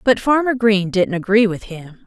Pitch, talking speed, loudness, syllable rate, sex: 210 Hz, 205 wpm, -16 LUFS, 4.6 syllables/s, female